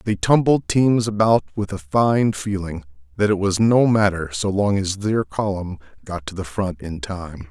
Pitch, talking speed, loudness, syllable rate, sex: 100 Hz, 190 wpm, -20 LUFS, 4.4 syllables/s, male